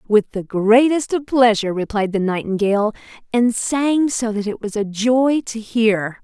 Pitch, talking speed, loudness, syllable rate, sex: 225 Hz, 175 wpm, -18 LUFS, 4.4 syllables/s, female